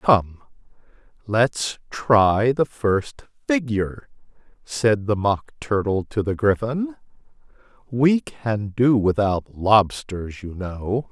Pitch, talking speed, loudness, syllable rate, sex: 110 Hz, 110 wpm, -21 LUFS, 3.1 syllables/s, male